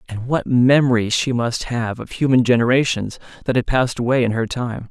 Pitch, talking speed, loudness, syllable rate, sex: 120 Hz, 195 wpm, -18 LUFS, 5.4 syllables/s, male